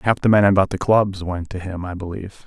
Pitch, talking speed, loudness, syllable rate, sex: 95 Hz, 270 wpm, -19 LUFS, 6.0 syllables/s, male